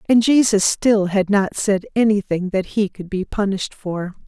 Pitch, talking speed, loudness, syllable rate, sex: 200 Hz, 180 wpm, -19 LUFS, 4.7 syllables/s, female